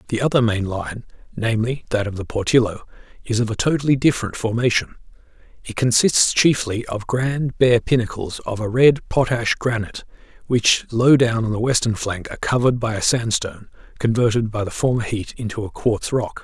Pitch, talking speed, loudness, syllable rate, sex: 115 Hz, 175 wpm, -19 LUFS, 5.4 syllables/s, male